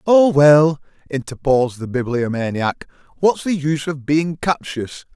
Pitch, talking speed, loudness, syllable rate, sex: 145 Hz, 130 wpm, -18 LUFS, 4.5 syllables/s, male